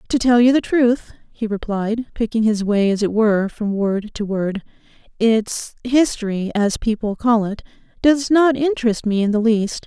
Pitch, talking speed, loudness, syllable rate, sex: 225 Hz, 180 wpm, -18 LUFS, 4.6 syllables/s, female